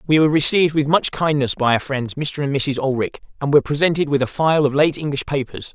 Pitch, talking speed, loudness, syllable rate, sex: 145 Hz, 240 wpm, -18 LUFS, 6.3 syllables/s, male